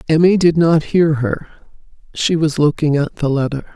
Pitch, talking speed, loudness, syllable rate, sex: 155 Hz, 175 wpm, -16 LUFS, 5.0 syllables/s, female